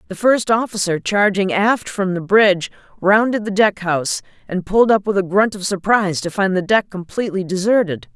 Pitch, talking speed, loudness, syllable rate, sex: 200 Hz, 190 wpm, -17 LUFS, 5.4 syllables/s, female